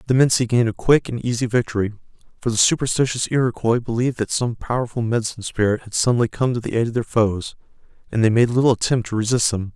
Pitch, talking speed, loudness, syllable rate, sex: 115 Hz, 215 wpm, -20 LUFS, 6.8 syllables/s, male